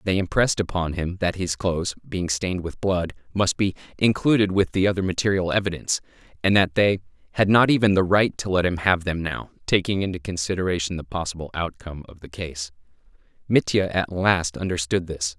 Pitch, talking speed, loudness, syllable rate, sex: 90 Hz, 185 wpm, -23 LUFS, 5.7 syllables/s, male